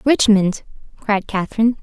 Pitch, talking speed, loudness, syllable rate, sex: 215 Hz, 100 wpm, -17 LUFS, 5.2 syllables/s, female